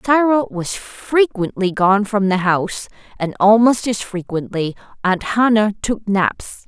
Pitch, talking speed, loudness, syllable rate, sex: 210 Hz, 135 wpm, -17 LUFS, 4.0 syllables/s, female